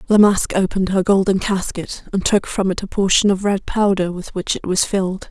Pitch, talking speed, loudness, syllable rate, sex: 190 Hz, 225 wpm, -18 LUFS, 5.4 syllables/s, female